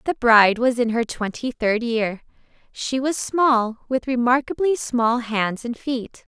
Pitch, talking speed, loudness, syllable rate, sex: 240 Hz, 160 wpm, -21 LUFS, 4.0 syllables/s, female